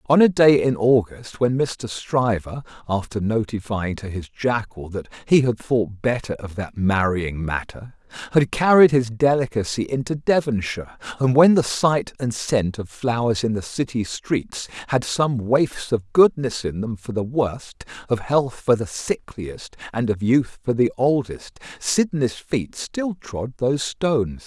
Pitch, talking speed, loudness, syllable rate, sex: 120 Hz, 165 wpm, -21 LUFS, 3.5 syllables/s, male